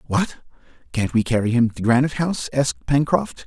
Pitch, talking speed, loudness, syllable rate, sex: 125 Hz, 175 wpm, -21 LUFS, 5.8 syllables/s, male